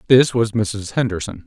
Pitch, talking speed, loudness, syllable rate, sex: 110 Hz, 165 wpm, -19 LUFS, 4.7 syllables/s, male